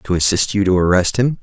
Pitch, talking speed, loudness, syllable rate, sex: 100 Hz, 250 wpm, -15 LUFS, 6.0 syllables/s, male